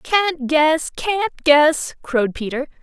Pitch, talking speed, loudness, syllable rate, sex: 305 Hz, 125 wpm, -18 LUFS, 3.3 syllables/s, female